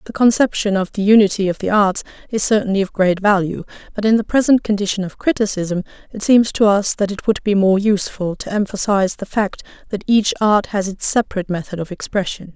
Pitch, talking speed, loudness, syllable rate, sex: 200 Hz, 205 wpm, -17 LUFS, 5.9 syllables/s, female